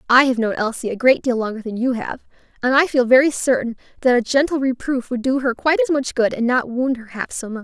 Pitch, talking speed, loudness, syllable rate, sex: 250 Hz, 265 wpm, -19 LUFS, 6.1 syllables/s, female